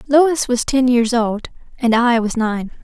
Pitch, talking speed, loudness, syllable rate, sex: 240 Hz, 190 wpm, -16 LUFS, 4.0 syllables/s, female